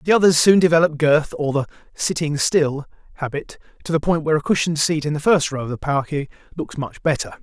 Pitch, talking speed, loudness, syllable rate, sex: 150 Hz, 220 wpm, -19 LUFS, 6.1 syllables/s, male